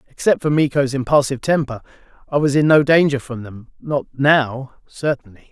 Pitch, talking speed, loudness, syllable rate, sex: 135 Hz, 150 wpm, -18 LUFS, 5.2 syllables/s, male